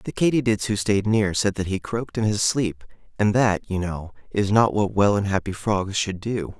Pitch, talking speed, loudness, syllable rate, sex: 100 Hz, 225 wpm, -22 LUFS, 4.9 syllables/s, male